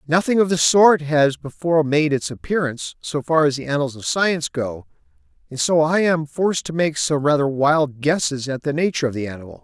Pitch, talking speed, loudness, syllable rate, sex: 150 Hz, 210 wpm, -19 LUFS, 5.6 syllables/s, male